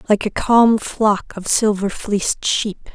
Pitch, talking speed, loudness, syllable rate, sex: 210 Hz, 165 wpm, -17 LUFS, 3.9 syllables/s, female